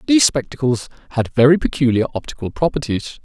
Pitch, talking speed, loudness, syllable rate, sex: 140 Hz, 130 wpm, -18 LUFS, 6.3 syllables/s, male